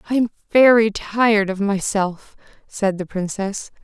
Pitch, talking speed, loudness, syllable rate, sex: 205 Hz, 140 wpm, -19 LUFS, 4.3 syllables/s, female